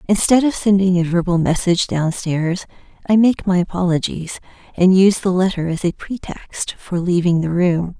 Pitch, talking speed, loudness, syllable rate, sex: 180 Hz, 165 wpm, -17 LUFS, 4.9 syllables/s, female